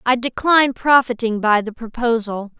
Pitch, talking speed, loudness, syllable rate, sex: 235 Hz, 140 wpm, -17 LUFS, 4.9 syllables/s, female